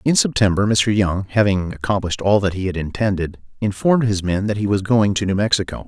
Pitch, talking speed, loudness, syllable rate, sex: 100 Hz, 215 wpm, -19 LUFS, 5.9 syllables/s, male